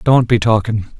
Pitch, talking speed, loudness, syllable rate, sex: 110 Hz, 180 wpm, -15 LUFS, 4.7 syllables/s, male